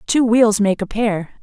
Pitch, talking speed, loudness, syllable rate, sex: 215 Hz, 210 wpm, -16 LUFS, 4.2 syllables/s, female